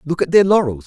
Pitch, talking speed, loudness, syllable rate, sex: 160 Hz, 280 wpm, -15 LUFS, 6.5 syllables/s, male